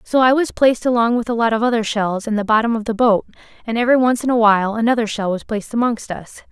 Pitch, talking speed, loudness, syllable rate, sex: 230 Hz, 265 wpm, -17 LUFS, 6.7 syllables/s, female